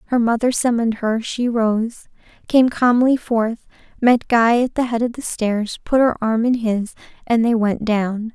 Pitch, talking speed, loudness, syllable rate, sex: 230 Hz, 185 wpm, -18 LUFS, 4.4 syllables/s, female